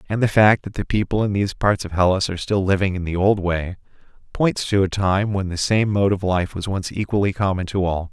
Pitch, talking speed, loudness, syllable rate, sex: 95 Hz, 250 wpm, -20 LUFS, 5.7 syllables/s, male